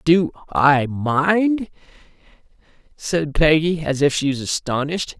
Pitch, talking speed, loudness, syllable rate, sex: 155 Hz, 90 wpm, -19 LUFS, 3.8 syllables/s, male